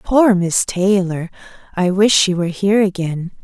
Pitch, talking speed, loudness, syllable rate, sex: 190 Hz, 140 wpm, -16 LUFS, 4.7 syllables/s, female